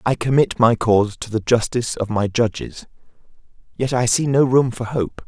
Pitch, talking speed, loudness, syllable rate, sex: 120 Hz, 195 wpm, -19 LUFS, 5.1 syllables/s, male